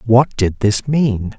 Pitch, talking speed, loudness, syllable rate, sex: 115 Hz, 175 wpm, -16 LUFS, 3.2 syllables/s, male